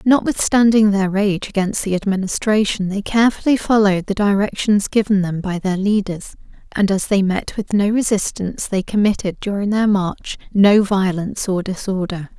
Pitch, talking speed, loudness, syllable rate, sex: 200 Hz, 155 wpm, -18 LUFS, 5.1 syllables/s, female